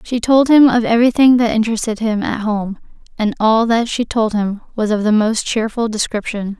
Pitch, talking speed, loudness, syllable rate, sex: 225 Hz, 200 wpm, -15 LUFS, 5.2 syllables/s, female